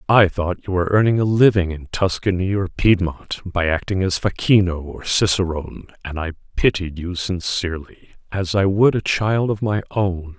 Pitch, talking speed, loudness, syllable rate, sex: 95 Hz, 175 wpm, -19 LUFS, 4.9 syllables/s, male